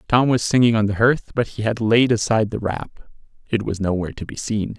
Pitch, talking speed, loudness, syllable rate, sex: 110 Hz, 225 wpm, -20 LUFS, 5.7 syllables/s, male